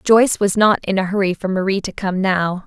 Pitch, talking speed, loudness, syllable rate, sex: 195 Hz, 250 wpm, -17 LUFS, 5.5 syllables/s, female